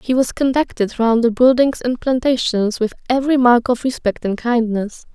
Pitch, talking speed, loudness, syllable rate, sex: 245 Hz, 175 wpm, -17 LUFS, 5.0 syllables/s, female